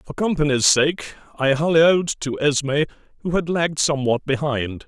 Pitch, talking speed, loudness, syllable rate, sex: 145 Hz, 150 wpm, -20 LUFS, 5.1 syllables/s, male